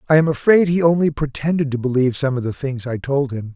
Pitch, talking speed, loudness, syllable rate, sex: 140 Hz, 255 wpm, -18 LUFS, 6.3 syllables/s, male